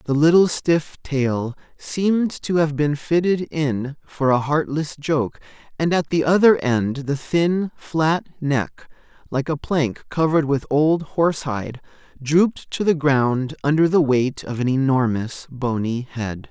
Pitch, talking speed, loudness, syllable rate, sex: 145 Hz, 155 wpm, -20 LUFS, 3.9 syllables/s, male